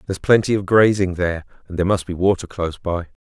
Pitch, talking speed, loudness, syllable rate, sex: 95 Hz, 225 wpm, -19 LUFS, 7.0 syllables/s, male